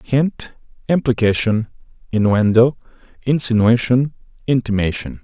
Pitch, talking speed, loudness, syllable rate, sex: 115 Hz, 55 wpm, -17 LUFS, 4.4 syllables/s, male